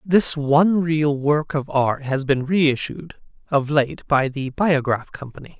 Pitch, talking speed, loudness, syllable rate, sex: 145 Hz, 160 wpm, -20 LUFS, 3.8 syllables/s, male